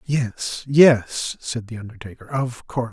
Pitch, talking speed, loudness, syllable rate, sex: 120 Hz, 125 wpm, -20 LUFS, 4.0 syllables/s, male